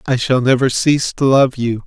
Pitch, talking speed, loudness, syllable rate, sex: 130 Hz, 225 wpm, -15 LUFS, 5.1 syllables/s, male